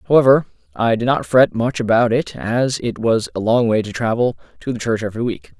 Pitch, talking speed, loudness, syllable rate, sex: 115 Hz, 225 wpm, -18 LUFS, 5.6 syllables/s, male